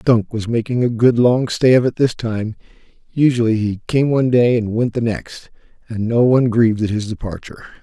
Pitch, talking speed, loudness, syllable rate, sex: 115 Hz, 205 wpm, -17 LUFS, 5.5 syllables/s, male